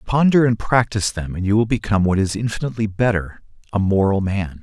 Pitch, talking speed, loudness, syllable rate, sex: 105 Hz, 180 wpm, -19 LUFS, 6.2 syllables/s, male